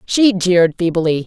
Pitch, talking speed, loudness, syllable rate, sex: 180 Hz, 140 wpm, -15 LUFS, 4.4 syllables/s, female